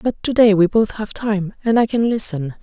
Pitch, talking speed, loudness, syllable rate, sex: 210 Hz, 250 wpm, -17 LUFS, 5.0 syllables/s, female